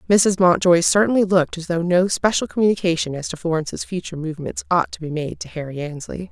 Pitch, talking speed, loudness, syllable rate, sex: 175 Hz, 200 wpm, -20 LUFS, 6.5 syllables/s, female